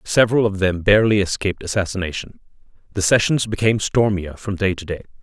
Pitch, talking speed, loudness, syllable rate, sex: 100 Hz, 160 wpm, -19 LUFS, 6.4 syllables/s, male